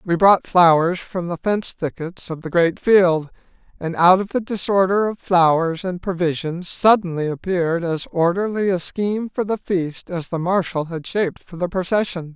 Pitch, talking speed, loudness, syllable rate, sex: 180 Hz, 180 wpm, -19 LUFS, 4.8 syllables/s, male